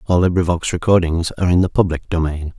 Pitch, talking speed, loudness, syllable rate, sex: 85 Hz, 185 wpm, -17 LUFS, 6.3 syllables/s, male